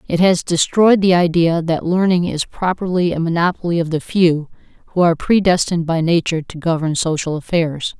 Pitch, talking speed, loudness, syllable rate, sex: 170 Hz, 175 wpm, -16 LUFS, 5.5 syllables/s, female